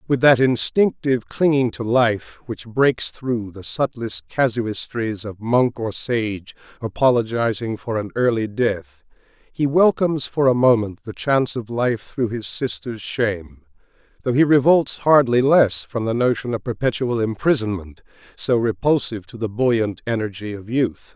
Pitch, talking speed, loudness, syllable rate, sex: 115 Hz, 150 wpm, -20 LUFS, 4.4 syllables/s, male